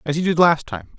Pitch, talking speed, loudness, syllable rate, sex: 150 Hz, 305 wpm, -18 LUFS, 5.9 syllables/s, male